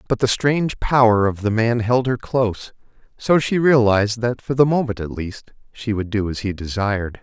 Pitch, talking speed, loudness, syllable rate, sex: 115 Hz, 210 wpm, -19 LUFS, 5.1 syllables/s, male